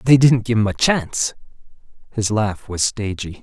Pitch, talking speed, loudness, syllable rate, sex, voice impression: 110 Hz, 175 wpm, -19 LUFS, 4.6 syllables/s, male, masculine, adult-like, tensed, powerful, slightly bright, clear, fluent, intellectual, friendly, unique, lively, slightly kind, slightly sharp, slightly light